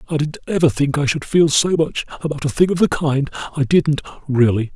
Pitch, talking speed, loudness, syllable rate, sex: 150 Hz, 215 wpm, -18 LUFS, 5.5 syllables/s, male